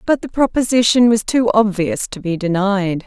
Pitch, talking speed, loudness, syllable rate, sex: 215 Hz, 175 wpm, -16 LUFS, 4.9 syllables/s, female